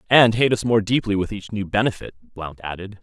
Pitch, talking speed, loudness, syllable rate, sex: 105 Hz, 220 wpm, -20 LUFS, 5.5 syllables/s, male